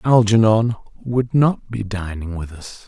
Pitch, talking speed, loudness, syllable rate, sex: 110 Hz, 145 wpm, -19 LUFS, 3.9 syllables/s, male